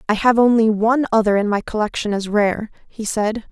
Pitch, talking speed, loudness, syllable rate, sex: 215 Hz, 205 wpm, -18 LUFS, 5.7 syllables/s, female